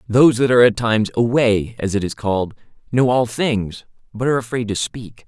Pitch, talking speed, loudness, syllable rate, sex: 115 Hz, 205 wpm, -18 LUFS, 5.7 syllables/s, male